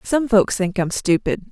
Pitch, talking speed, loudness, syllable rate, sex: 210 Hz, 200 wpm, -19 LUFS, 4.3 syllables/s, female